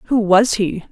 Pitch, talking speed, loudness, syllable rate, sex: 205 Hz, 195 wpm, -15 LUFS, 3.6 syllables/s, female